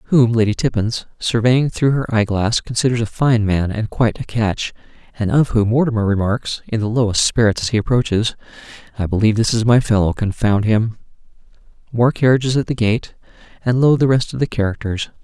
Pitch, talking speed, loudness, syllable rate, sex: 115 Hz, 190 wpm, -17 LUFS, 5.6 syllables/s, male